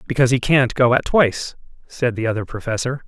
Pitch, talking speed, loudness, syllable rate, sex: 125 Hz, 195 wpm, -18 LUFS, 6.4 syllables/s, male